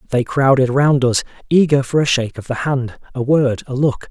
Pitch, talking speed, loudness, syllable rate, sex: 135 Hz, 220 wpm, -16 LUFS, 5.3 syllables/s, male